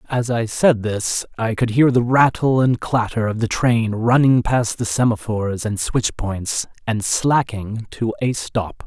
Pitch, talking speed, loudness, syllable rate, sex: 115 Hz, 175 wpm, -19 LUFS, 4.0 syllables/s, male